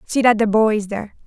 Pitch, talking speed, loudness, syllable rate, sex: 215 Hz, 285 wpm, -17 LUFS, 6.4 syllables/s, female